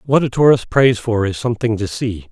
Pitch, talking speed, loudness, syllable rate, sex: 115 Hz, 235 wpm, -16 LUFS, 5.5 syllables/s, male